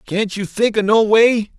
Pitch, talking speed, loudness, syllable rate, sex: 215 Hz, 230 wpm, -15 LUFS, 4.2 syllables/s, male